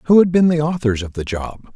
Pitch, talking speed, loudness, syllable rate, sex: 145 Hz, 275 wpm, -17 LUFS, 5.9 syllables/s, male